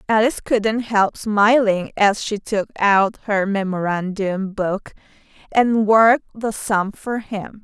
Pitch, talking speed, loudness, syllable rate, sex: 210 Hz, 135 wpm, -19 LUFS, 3.6 syllables/s, female